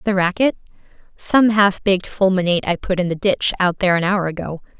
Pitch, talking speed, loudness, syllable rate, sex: 190 Hz, 200 wpm, -18 LUFS, 5.9 syllables/s, female